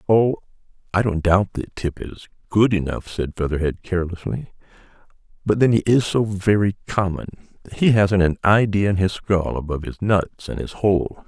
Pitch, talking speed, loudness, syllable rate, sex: 95 Hz, 170 wpm, -20 LUFS, 4.9 syllables/s, male